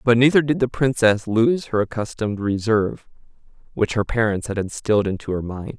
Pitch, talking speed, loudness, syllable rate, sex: 115 Hz, 175 wpm, -20 LUFS, 5.6 syllables/s, male